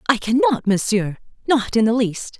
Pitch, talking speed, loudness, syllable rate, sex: 225 Hz, 175 wpm, -19 LUFS, 4.8 syllables/s, female